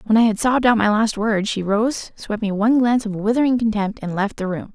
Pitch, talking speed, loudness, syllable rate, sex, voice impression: 220 Hz, 265 wpm, -19 LUFS, 5.9 syllables/s, female, very feminine, slightly young, slightly adult-like, very thin, very tensed, very powerful, very bright, slightly hard, very clear, very fluent, very cute, intellectual, very refreshing, sincere, calm, friendly, very reassuring, very unique, elegant, very sweet, lively, kind, slightly intense